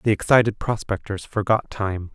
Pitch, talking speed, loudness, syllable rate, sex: 100 Hz, 140 wpm, -22 LUFS, 4.8 syllables/s, male